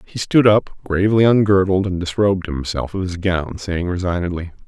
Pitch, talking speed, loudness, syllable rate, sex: 95 Hz, 165 wpm, -18 LUFS, 5.2 syllables/s, male